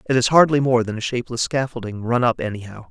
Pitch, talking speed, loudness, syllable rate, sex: 120 Hz, 225 wpm, -20 LUFS, 6.5 syllables/s, male